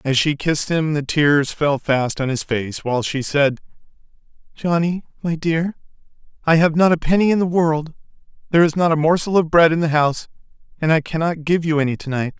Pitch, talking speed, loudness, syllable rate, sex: 155 Hz, 205 wpm, -18 LUFS, 5.5 syllables/s, male